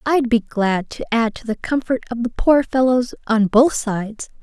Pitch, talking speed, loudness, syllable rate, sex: 235 Hz, 205 wpm, -19 LUFS, 4.6 syllables/s, female